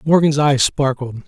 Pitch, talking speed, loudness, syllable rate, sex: 140 Hz, 140 wpm, -16 LUFS, 4.3 syllables/s, male